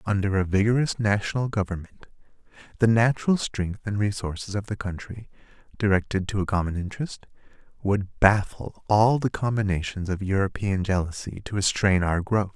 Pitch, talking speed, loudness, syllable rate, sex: 100 Hz, 145 wpm, -25 LUFS, 5.3 syllables/s, male